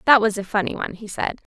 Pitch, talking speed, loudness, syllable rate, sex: 210 Hz, 270 wpm, -22 LUFS, 7.4 syllables/s, female